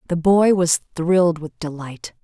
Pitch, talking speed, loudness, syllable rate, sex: 170 Hz, 160 wpm, -18 LUFS, 4.3 syllables/s, female